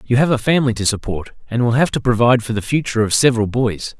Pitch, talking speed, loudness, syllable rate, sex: 120 Hz, 255 wpm, -17 LUFS, 6.9 syllables/s, male